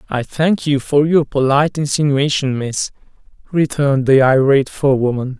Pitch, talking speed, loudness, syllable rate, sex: 140 Hz, 135 wpm, -15 LUFS, 5.2 syllables/s, male